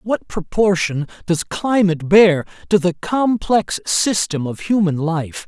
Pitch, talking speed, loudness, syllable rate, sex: 185 Hz, 130 wpm, -18 LUFS, 3.9 syllables/s, male